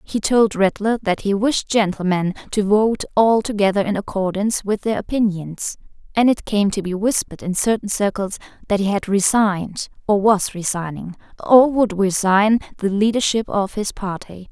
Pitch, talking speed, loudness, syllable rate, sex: 205 Hz, 160 wpm, -19 LUFS, 4.9 syllables/s, female